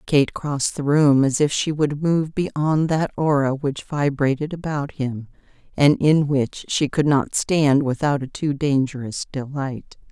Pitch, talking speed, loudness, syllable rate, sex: 145 Hz, 165 wpm, -21 LUFS, 4.0 syllables/s, female